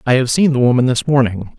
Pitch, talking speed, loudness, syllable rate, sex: 130 Hz, 265 wpm, -14 LUFS, 6.3 syllables/s, male